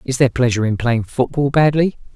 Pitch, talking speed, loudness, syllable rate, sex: 130 Hz, 195 wpm, -17 LUFS, 6.3 syllables/s, male